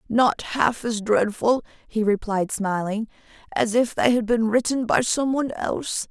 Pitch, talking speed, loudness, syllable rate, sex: 225 Hz, 165 wpm, -23 LUFS, 4.4 syllables/s, female